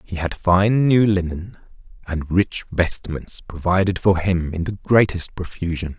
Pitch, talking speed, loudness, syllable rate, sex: 90 Hz, 150 wpm, -20 LUFS, 4.2 syllables/s, male